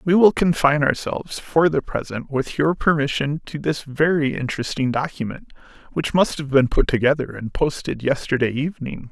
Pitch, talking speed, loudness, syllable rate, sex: 145 Hz, 165 wpm, -21 LUFS, 5.3 syllables/s, male